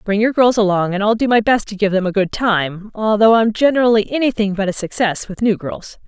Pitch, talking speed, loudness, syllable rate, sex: 210 Hz, 245 wpm, -16 LUFS, 5.6 syllables/s, female